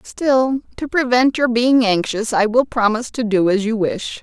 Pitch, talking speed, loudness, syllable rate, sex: 230 Hz, 200 wpm, -17 LUFS, 4.5 syllables/s, female